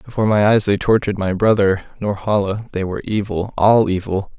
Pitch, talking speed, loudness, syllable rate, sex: 100 Hz, 165 wpm, -17 LUFS, 5.7 syllables/s, male